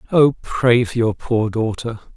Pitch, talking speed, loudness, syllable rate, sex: 115 Hz, 165 wpm, -18 LUFS, 3.9 syllables/s, male